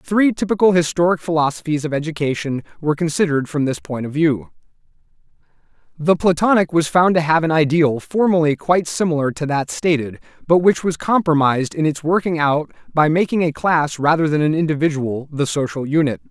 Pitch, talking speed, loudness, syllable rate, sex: 160 Hz, 170 wpm, -18 LUFS, 5.7 syllables/s, male